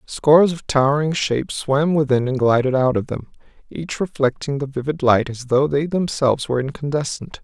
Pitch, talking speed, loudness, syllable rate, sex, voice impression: 140 Hz, 180 wpm, -19 LUFS, 5.4 syllables/s, male, very masculine, very adult-like, middle-aged, slightly thick, slightly tensed, slightly weak, slightly dark, hard, slightly muffled, fluent, cool, very intellectual, refreshing, very sincere, very calm, slightly mature, friendly, reassuring, slightly unique, elegant, sweet, slightly lively, kind, very modest